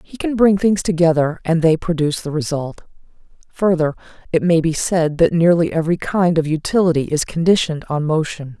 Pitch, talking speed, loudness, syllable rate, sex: 165 Hz, 175 wpm, -17 LUFS, 5.5 syllables/s, female